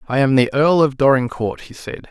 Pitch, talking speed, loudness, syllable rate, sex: 130 Hz, 230 wpm, -16 LUFS, 5.2 syllables/s, male